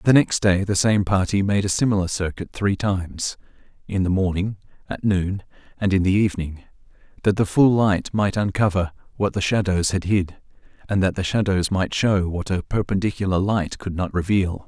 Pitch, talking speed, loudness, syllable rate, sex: 95 Hz, 175 wpm, -21 LUFS, 5.1 syllables/s, male